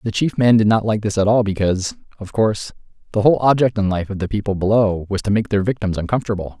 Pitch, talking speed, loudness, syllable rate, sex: 105 Hz, 245 wpm, -18 LUFS, 6.7 syllables/s, male